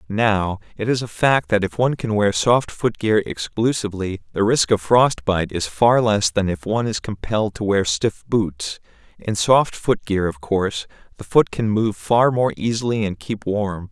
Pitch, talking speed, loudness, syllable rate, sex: 105 Hz, 205 wpm, -20 LUFS, 4.6 syllables/s, male